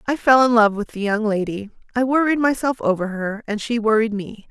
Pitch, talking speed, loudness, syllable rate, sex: 225 Hz, 225 wpm, -19 LUFS, 5.4 syllables/s, female